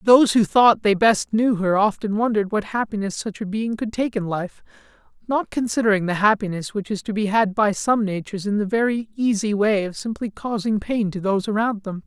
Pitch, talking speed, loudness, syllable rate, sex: 210 Hz, 215 wpm, -21 LUFS, 5.5 syllables/s, male